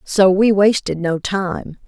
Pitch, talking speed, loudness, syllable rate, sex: 190 Hz, 160 wpm, -16 LUFS, 3.5 syllables/s, female